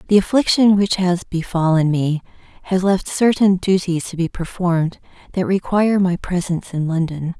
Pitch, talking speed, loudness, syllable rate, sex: 180 Hz, 155 wpm, -18 LUFS, 5.0 syllables/s, female